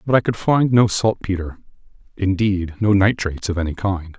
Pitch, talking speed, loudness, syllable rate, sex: 100 Hz, 170 wpm, -19 LUFS, 5.2 syllables/s, male